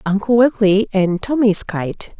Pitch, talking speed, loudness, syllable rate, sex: 205 Hz, 135 wpm, -16 LUFS, 4.4 syllables/s, female